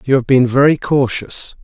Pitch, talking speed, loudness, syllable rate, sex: 130 Hz, 185 wpm, -14 LUFS, 4.7 syllables/s, male